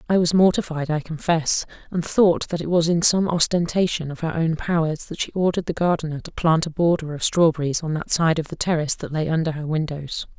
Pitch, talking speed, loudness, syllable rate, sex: 165 Hz, 225 wpm, -21 LUFS, 5.8 syllables/s, female